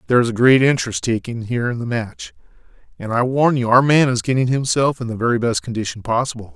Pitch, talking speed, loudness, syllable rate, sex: 120 Hz, 230 wpm, -18 LUFS, 6.5 syllables/s, male